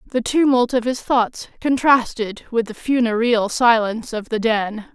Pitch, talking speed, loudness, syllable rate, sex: 235 Hz, 160 wpm, -19 LUFS, 4.3 syllables/s, female